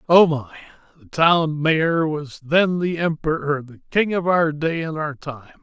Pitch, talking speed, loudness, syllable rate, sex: 155 Hz, 180 wpm, -20 LUFS, 4.1 syllables/s, male